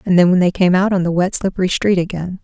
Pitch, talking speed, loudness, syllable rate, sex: 185 Hz, 270 wpm, -16 LUFS, 6.0 syllables/s, female